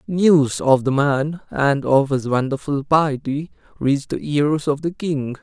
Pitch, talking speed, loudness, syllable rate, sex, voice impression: 145 Hz, 165 wpm, -19 LUFS, 3.9 syllables/s, male, masculine, slightly young, tensed, slightly powerful, bright, soft, slightly muffled, cool, slightly refreshing, friendly, reassuring, lively, slightly kind